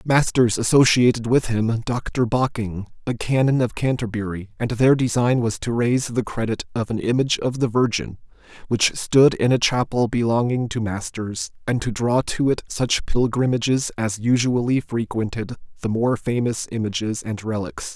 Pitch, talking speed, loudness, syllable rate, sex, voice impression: 120 Hz, 160 wpm, -21 LUFS, 4.8 syllables/s, male, very masculine, very adult-like, very thick, very tensed, very powerful, bright, slightly hard, very clear, fluent, slightly raspy, cool, intellectual, very refreshing, sincere, calm, very friendly, very reassuring, slightly unique, elegant, very wild, sweet, lively, kind, slightly intense